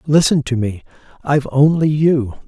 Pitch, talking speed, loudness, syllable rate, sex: 140 Hz, 145 wpm, -16 LUFS, 4.9 syllables/s, male